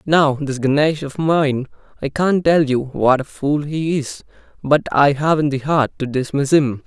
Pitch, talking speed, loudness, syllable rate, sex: 145 Hz, 185 wpm, -18 LUFS, 4.2 syllables/s, male